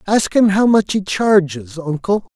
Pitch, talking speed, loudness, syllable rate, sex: 190 Hz, 180 wpm, -16 LUFS, 4.1 syllables/s, male